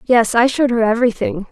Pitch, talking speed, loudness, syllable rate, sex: 235 Hz, 195 wpm, -15 LUFS, 6.4 syllables/s, female